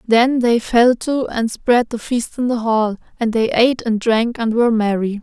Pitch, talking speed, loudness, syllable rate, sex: 230 Hz, 220 wpm, -17 LUFS, 4.5 syllables/s, female